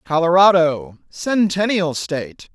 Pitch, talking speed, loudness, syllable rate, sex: 175 Hz, 70 wpm, -17 LUFS, 3.9 syllables/s, male